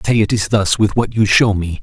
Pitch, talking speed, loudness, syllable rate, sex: 105 Hz, 295 wpm, -15 LUFS, 5.3 syllables/s, male